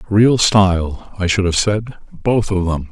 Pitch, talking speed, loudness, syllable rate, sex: 100 Hz, 165 wpm, -16 LUFS, 4.3 syllables/s, male